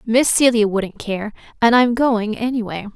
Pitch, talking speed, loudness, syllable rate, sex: 225 Hz, 185 wpm, -17 LUFS, 4.4 syllables/s, female